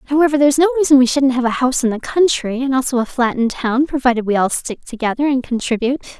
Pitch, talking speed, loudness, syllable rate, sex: 260 Hz, 240 wpm, -16 LUFS, 6.7 syllables/s, female